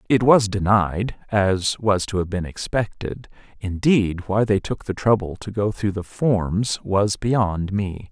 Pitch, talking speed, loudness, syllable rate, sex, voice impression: 100 Hz, 170 wpm, -21 LUFS, 3.7 syllables/s, male, masculine, middle-aged, slightly thick, slightly powerful, soft, clear, fluent, cool, intellectual, calm, friendly, reassuring, slightly wild, lively, slightly light